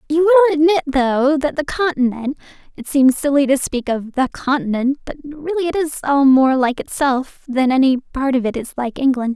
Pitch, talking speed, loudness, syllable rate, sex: 280 Hz, 190 wpm, -17 LUFS, 5.1 syllables/s, female